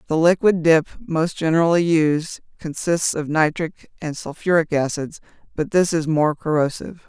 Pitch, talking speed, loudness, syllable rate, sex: 160 Hz, 145 wpm, -20 LUFS, 4.7 syllables/s, female